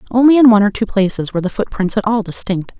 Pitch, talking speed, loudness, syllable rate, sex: 210 Hz, 260 wpm, -14 LUFS, 7.0 syllables/s, female